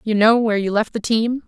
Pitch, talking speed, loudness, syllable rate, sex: 220 Hz, 285 wpm, -18 LUFS, 5.9 syllables/s, female